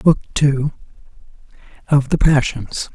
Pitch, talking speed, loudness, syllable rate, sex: 140 Hz, 100 wpm, -18 LUFS, 3.8 syllables/s, male